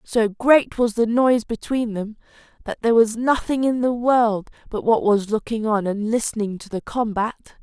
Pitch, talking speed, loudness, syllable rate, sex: 225 Hz, 190 wpm, -20 LUFS, 4.9 syllables/s, female